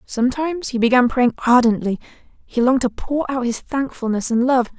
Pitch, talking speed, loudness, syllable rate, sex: 250 Hz, 175 wpm, -19 LUFS, 5.6 syllables/s, female